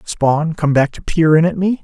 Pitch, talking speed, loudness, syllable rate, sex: 160 Hz, 260 wpm, -15 LUFS, 4.6 syllables/s, male